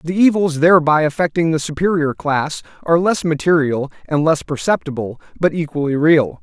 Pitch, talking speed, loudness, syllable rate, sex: 160 Hz, 150 wpm, -17 LUFS, 5.4 syllables/s, male